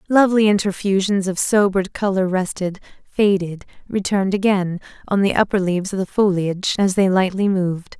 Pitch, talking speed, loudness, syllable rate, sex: 195 Hz, 150 wpm, -19 LUFS, 5.6 syllables/s, female